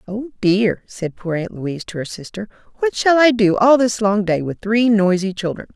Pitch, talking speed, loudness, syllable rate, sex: 205 Hz, 220 wpm, -18 LUFS, 4.9 syllables/s, female